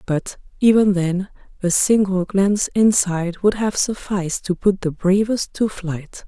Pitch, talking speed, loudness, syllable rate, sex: 190 Hz, 155 wpm, -19 LUFS, 4.3 syllables/s, female